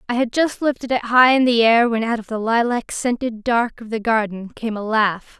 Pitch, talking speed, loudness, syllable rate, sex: 230 Hz, 245 wpm, -19 LUFS, 5.0 syllables/s, female